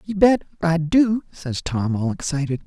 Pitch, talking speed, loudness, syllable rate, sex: 165 Hz, 180 wpm, -21 LUFS, 4.4 syllables/s, male